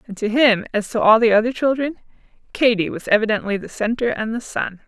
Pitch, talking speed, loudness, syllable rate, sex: 220 Hz, 210 wpm, -19 LUFS, 5.9 syllables/s, female